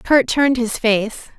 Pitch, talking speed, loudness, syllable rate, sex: 240 Hz, 175 wpm, -17 LUFS, 3.9 syllables/s, female